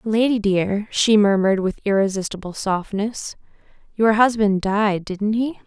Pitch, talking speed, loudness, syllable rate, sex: 205 Hz, 125 wpm, -19 LUFS, 4.3 syllables/s, female